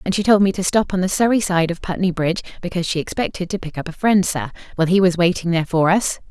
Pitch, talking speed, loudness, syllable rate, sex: 180 Hz, 275 wpm, -19 LUFS, 6.7 syllables/s, female